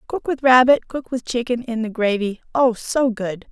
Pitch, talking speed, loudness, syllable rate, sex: 240 Hz, 190 wpm, -19 LUFS, 4.7 syllables/s, female